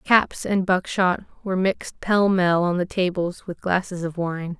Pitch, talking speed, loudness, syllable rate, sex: 180 Hz, 185 wpm, -22 LUFS, 4.5 syllables/s, female